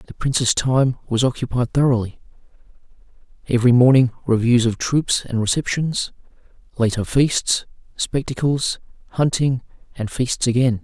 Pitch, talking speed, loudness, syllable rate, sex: 125 Hz, 105 wpm, -19 LUFS, 4.7 syllables/s, male